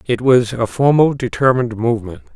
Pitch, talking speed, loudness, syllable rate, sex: 125 Hz, 155 wpm, -15 LUFS, 6.1 syllables/s, male